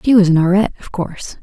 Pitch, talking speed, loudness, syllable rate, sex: 190 Hz, 250 wpm, -15 LUFS, 7.3 syllables/s, female